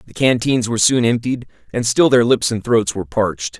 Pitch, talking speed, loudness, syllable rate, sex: 115 Hz, 215 wpm, -17 LUFS, 5.7 syllables/s, male